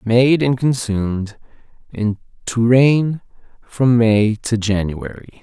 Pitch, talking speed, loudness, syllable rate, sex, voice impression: 115 Hz, 100 wpm, -17 LUFS, 3.6 syllables/s, male, masculine, slightly adult-like, slightly middle-aged, very thick, slightly thin, slightly relaxed, slightly powerful, dark, hard, clear, slightly muffled, fluent, cool, intellectual, very refreshing, sincere, very mature, friendly, reassuring, unique, slightly elegant, wild, sweet, kind, slightly intense, slightly modest, very light